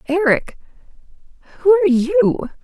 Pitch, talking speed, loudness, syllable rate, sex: 335 Hz, 70 wpm, -16 LUFS, 4.6 syllables/s, female